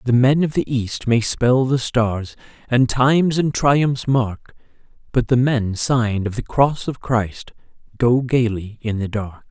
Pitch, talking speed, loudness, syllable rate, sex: 120 Hz, 175 wpm, -19 LUFS, 3.9 syllables/s, male